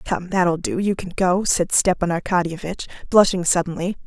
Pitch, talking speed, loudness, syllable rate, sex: 180 Hz, 160 wpm, -20 LUFS, 4.9 syllables/s, female